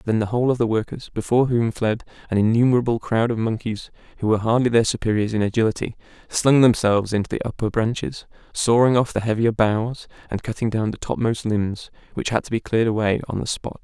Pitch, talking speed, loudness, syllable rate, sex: 115 Hz, 205 wpm, -21 LUFS, 6.2 syllables/s, male